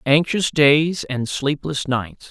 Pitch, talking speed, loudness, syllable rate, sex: 150 Hz, 130 wpm, -19 LUFS, 3.2 syllables/s, male